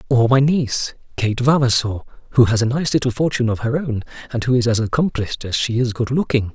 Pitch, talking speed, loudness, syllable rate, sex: 125 Hz, 220 wpm, -19 LUFS, 6.2 syllables/s, male